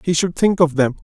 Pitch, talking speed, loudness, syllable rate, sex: 165 Hz, 270 wpm, -17 LUFS, 5.9 syllables/s, male